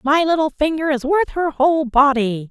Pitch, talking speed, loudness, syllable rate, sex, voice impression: 290 Hz, 190 wpm, -17 LUFS, 5.0 syllables/s, female, feminine, adult-like, clear, fluent, slightly intellectual, slightly refreshing, friendly, reassuring